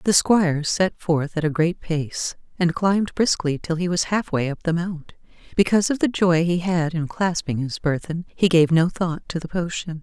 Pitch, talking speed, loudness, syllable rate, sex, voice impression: 170 Hz, 210 wpm, -22 LUFS, 4.8 syllables/s, female, very feminine, very adult-like, slightly middle-aged, thin, slightly tensed, slightly weak, slightly dark, very soft, clear, fluent, cute, slightly cool, very intellectual, refreshing, sincere, very calm, very friendly, very reassuring, unique, very elegant, very sweet, slightly lively, very kind, slightly modest